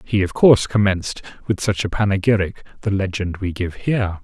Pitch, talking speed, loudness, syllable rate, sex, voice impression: 100 Hz, 185 wpm, -19 LUFS, 5.7 syllables/s, male, very masculine, middle-aged, slightly thick, cool, sincere, slightly friendly, slightly kind